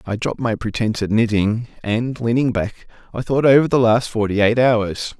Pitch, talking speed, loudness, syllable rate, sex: 115 Hz, 195 wpm, -18 LUFS, 5.2 syllables/s, male